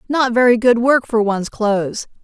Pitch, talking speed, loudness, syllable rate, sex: 230 Hz, 190 wpm, -16 LUFS, 5.2 syllables/s, female